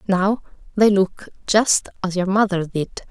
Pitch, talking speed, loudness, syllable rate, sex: 195 Hz, 155 wpm, -19 LUFS, 3.9 syllables/s, female